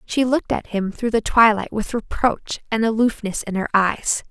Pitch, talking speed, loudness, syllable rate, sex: 220 Hz, 195 wpm, -20 LUFS, 4.7 syllables/s, female